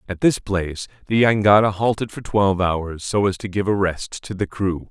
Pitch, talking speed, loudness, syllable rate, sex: 100 Hz, 220 wpm, -20 LUFS, 5.1 syllables/s, male